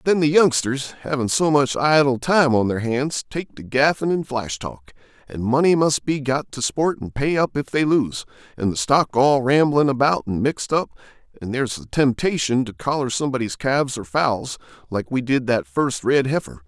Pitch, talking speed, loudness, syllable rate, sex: 130 Hz, 200 wpm, -20 LUFS, 4.9 syllables/s, male